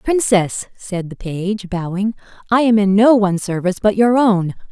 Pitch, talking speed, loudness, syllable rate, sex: 205 Hz, 180 wpm, -16 LUFS, 4.8 syllables/s, female